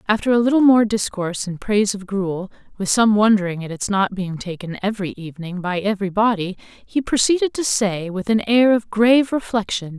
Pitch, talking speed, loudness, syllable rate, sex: 205 Hz, 185 wpm, -19 LUFS, 5.5 syllables/s, female